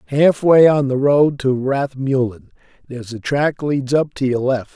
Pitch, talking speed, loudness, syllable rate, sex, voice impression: 135 Hz, 175 wpm, -17 LUFS, 4.5 syllables/s, male, masculine, middle-aged, relaxed, slightly weak, muffled, slightly halting, calm, slightly mature, slightly friendly, slightly wild, kind, modest